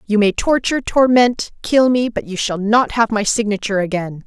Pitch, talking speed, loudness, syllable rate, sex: 220 Hz, 195 wpm, -16 LUFS, 5.2 syllables/s, female